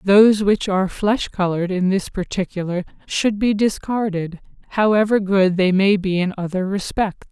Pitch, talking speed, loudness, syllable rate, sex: 195 Hz, 155 wpm, -19 LUFS, 4.8 syllables/s, female